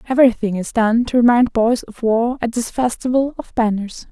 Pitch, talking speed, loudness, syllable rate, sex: 235 Hz, 190 wpm, -17 LUFS, 5.3 syllables/s, female